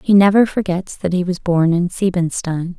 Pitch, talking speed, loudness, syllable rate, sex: 180 Hz, 195 wpm, -17 LUFS, 4.9 syllables/s, female